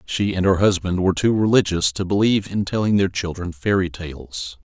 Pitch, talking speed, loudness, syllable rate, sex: 95 Hz, 190 wpm, -20 LUFS, 5.3 syllables/s, male